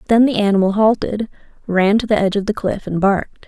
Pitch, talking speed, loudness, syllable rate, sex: 205 Hz, 225 wpm, -17 LUFS, 6.5 syllables/s, female